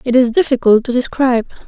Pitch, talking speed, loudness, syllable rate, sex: 245 Hz, 180 wpm, -14 LUFS, 6.5 syllables/s, female